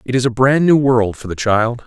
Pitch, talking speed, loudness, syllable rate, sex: 120 Hz, 290 wpm, -15 LUFS, 5.1 syllables/s, male